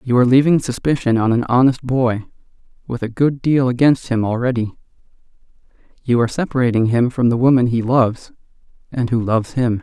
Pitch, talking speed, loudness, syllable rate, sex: 125 Hz, 170 wpm, -17 LUFS, 5.9 syllables/s, male